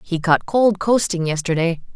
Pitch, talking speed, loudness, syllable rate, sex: 180 Hz, 155 wpm, -18 LUFS, 4.6 syllables/s, female